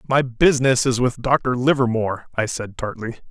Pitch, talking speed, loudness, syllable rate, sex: 125 Hz, 165 wpm, -20 LUFS, 5.2 syllables/s, male